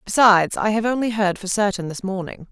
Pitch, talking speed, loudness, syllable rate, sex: 205 Hz, 215 wpm, -20 LUFS, 5.8 syllables/s, female